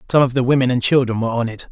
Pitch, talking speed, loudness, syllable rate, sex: 125 Hz, 315 wpm, -17 LUFS, 8.3 syllables/s, male